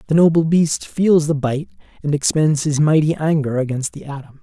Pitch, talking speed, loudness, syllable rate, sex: 150 Hz, 190 wpm, -17 LUFS, 5.1 syllables/s, male